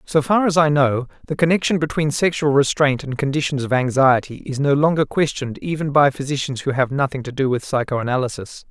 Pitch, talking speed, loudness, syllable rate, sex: 140 Hz, 195 wpm, -19 LUFS, 5.7 syllables/s, male